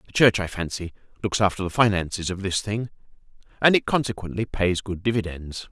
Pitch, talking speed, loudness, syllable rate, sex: 100 Hz, 180 wpm, -24 LUFS, 5.7 syllables/s, male